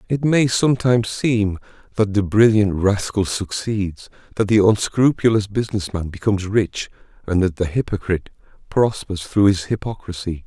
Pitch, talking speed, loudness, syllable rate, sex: 100 Hz, 140 wpm, -19 LUFS, 4.9 syllables/s, male